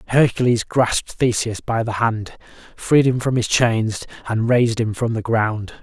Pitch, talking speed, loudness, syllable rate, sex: 115 Hz, 175 wpm, -19 LUFS, 4.5 syllables/s, male